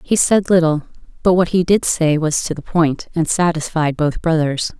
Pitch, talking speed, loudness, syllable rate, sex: 165 Hz, 200 wpm, -17 LUFS, 4.7 syllables/s, female